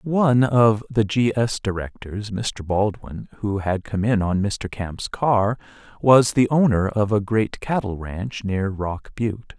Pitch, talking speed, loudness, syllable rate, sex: 110 Hz, 170 wpm, -21 LUFS, 3.8 syllables/s, male